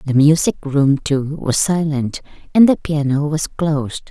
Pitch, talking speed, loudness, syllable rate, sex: 145 Hz, 160 wpm, -17 LUFS, 4.3 syllables/s, female